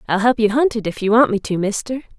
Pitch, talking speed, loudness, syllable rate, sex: 220 Hz, 300 wpm, -17 LUFS, 6.4 syllables/s, female